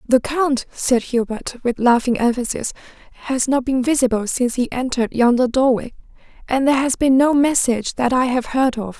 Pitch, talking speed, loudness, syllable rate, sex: 255 Hz, 180 wpm, -18 LUFS, 5.3 syllables/s, female